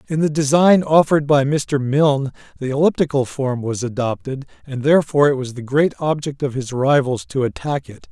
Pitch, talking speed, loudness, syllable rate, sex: 140 Hz, 185 wpm, -18 LUFS, 5.5 syllables/s, male